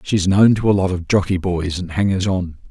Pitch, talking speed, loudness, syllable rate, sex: 95 Hz, 245 wpm, -18 LUFS, 5.2 syllables/s, male